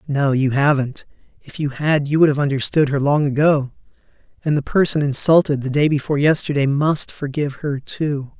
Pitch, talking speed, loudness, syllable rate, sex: 145 Hz, 170 wpm, -18 LUFS, 5.1 syllables/s, male